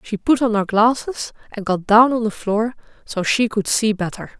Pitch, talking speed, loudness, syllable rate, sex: 220 Hz, 220 wpm, -19 LUFS, 4.8 syllables/s, female